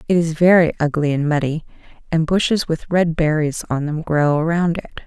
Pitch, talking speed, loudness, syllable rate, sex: 160 Hz, 190 wpm, -18 LUFS, 5.3 syllables/s, female